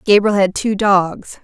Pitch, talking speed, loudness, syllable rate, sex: 200 Hz, 170 wpm, -15 LUFS, 3.9 syllables/s, female